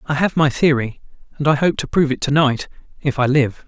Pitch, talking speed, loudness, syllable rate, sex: 145 Hz, 245 wpm, -18 LUFS, 5.9 syllables/s, male